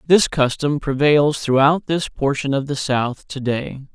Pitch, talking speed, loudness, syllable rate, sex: 140 Hz, 165 wpm, -19 LUFS, 4.1 syllables/s, male